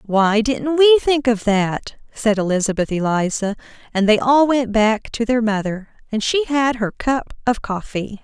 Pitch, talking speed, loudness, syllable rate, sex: 230 Hz, 175 wpm, -18 LUFS, 4.4 syllables/s, female